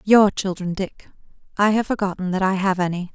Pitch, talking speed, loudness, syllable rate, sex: 195 Hz, 170 wpm, -21 LUFS, 5.4 syllables/s, female